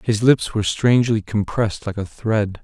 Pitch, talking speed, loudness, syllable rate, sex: 105 Hz, 180 wpm, -19 LUFS, 5.1 syllables/s, male